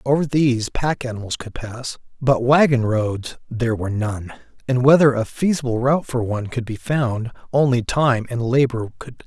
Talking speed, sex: 180 wpm, male